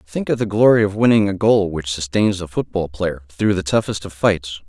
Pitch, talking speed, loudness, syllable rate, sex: 95 Hz, 230 wpm, -18 LUFS, 5.2 syllables/s, male